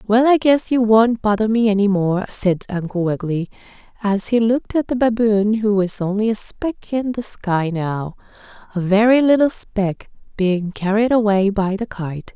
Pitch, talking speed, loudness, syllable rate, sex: 210 Hz, 180 wpm, -18 LUFS, 4.7 syllables/s, female